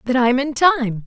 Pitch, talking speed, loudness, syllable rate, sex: 260 Hz, 225 wpm, -17 LUFS, 4.3 syllables/s, female